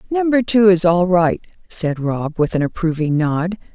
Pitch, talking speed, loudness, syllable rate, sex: 180 Hz, 175 wpm, -17 LUFS, 4.4 syllables/s, female